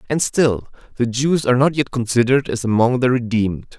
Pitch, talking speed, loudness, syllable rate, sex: 120 Hz, 190 wpm, -18 LUFS, 5.8 syllables/s, male